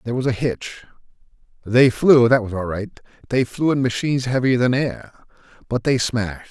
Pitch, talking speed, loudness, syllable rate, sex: 120 Hz, 175 wpm, -19 LUFS, 5.4 syllables/s, male